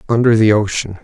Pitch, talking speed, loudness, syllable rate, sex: 110 Hz, 175 wpm, -14 LUFS, 5.9 syllables/s, male